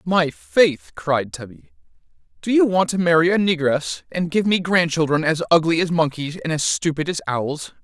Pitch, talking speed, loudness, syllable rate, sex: 165 Hz, 185 wpm, -19 LUFS, 4.7 syllables/s, male